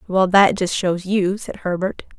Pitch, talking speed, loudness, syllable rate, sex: 190 Hz, 190 wpm, -19 LUFS, 4.2 syllables/s, female